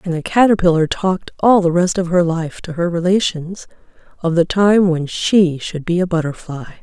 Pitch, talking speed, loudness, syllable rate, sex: 175 Hz, 195 wpm, -16 LUFS, 5.0 syllables/s, female